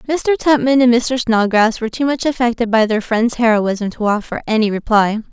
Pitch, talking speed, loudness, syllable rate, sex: 230 Hz, 190 wpm, -15 LUFS, 5.2 syllables/s, female